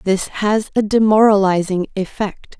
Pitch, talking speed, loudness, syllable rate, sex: 200 Hz, 115 wpm, -16 LUFS, 4.1 syllables/s, female